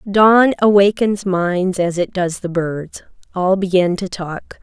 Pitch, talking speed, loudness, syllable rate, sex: 185 Hz, 155 wpm, -16 LUFS, 3.6 syllables/s, female